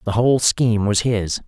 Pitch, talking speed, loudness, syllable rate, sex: 110 Hz, 205 wpm, -18 LUFS, 5.2 syllables/s, male